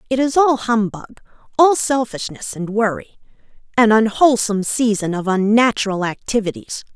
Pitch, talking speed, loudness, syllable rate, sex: 225 Hz, 110 wpm, -17 LUFS, 5.3 syllables/s, female